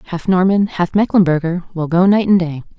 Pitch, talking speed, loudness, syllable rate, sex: 180 Hz, 195 wpm, -15 LUFS, 5.6 syllables/s, female